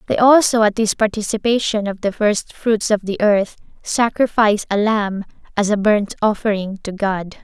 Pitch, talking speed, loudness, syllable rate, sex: 210 Hz, 170 wpm, -17 LUFS, 4.8 syllables/s, female